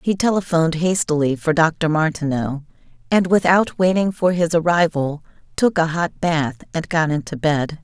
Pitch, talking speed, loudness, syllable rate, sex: 165 Hz, 155 wpm, -19 LUFS, 4.7 syllables/s, female